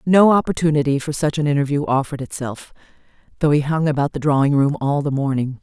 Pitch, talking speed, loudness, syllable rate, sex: 145 Hz, 190 wpm, -19 LUFS, 6.2 syllables/s, female